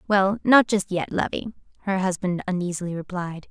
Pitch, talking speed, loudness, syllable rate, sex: 190 Hz, 155 wpm, -23 LUFS, 5.3 syllables/s, female